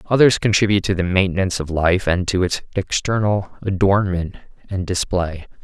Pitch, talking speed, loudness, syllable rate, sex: 95 Hz, 150 wpm, -19 LUFS, 5.1 syllables/s, male